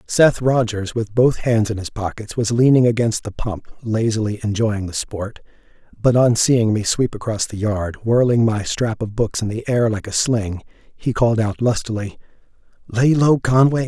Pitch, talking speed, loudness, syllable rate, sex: 115 Hz, 185 wpm, -19 LUFS, 4.6 syllables/s, male